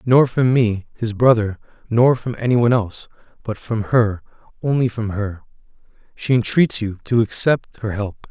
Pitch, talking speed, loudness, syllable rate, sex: 115 Hz, 165 wpm, -19 LUFS, 4.8 syllables/s, male